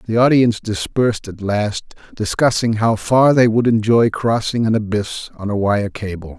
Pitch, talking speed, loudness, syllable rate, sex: 110 Hz, 170 wpm, -17 LUFS, 4.7 syllables/s, male